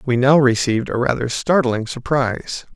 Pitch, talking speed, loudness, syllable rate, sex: 130 Hz, 150 wpm, -18 LUFS, 5.1 syllables/s, male